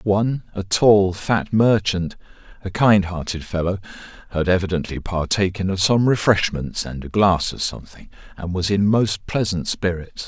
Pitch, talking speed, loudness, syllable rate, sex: 95 Hz, 150 wpm, -20 LUFS, 4.7 syllables/s, male